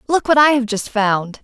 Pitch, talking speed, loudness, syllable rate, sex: 245 Hz, 250 wpm, -15 LUFS, 4.8 syllables/s, female